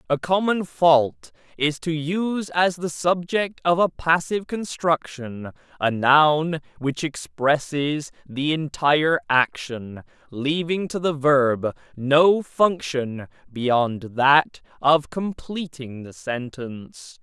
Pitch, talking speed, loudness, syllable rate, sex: 150 Hz, 110 wpm, -22 LUFS, 3.3 syllables/s, male